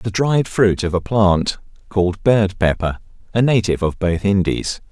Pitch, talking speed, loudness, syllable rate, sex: 100 Hz, 170 wpm, -18 LUFS, 4.6 syllables/s, male